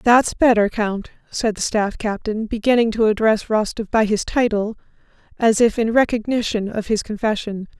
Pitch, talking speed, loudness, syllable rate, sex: 220 Hz, 160 wpm, -19 LUFS, 4.9 syllables/s, female